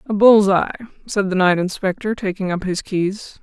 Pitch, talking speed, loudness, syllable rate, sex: 195 Hz, 195 wpm, -18 LUFS, 4.8 syllables/s, female